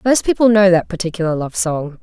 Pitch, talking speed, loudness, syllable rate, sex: 185 Hz, 210 wpm, -15 LUFS, 5.7 syllables/s, female